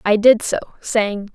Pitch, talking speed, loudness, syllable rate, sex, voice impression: 215 Hz, 180 wpm, -18 LUFS, 4.0 syllables/s, female, very feminine, slightly young, very thin, very tensed, powerful, very bright, very hard, very clear, fluent, slightly raspy, cute, slightly cool, intellectual, very refreshing, sincere, calm, friendly, reassuring, very unique, slightly elegant, wild, sweet, very lively, strict, intense, slightly sharp, light